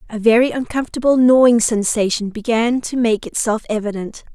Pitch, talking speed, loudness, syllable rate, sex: 230 Hz, 140 wpm, -16 LUFS, 5.5 syllables/s, female